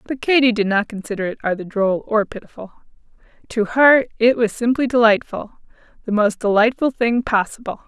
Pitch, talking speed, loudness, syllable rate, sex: 225 Hz, 150 wpm, -18 LUFS, 5.2 syllables/s, female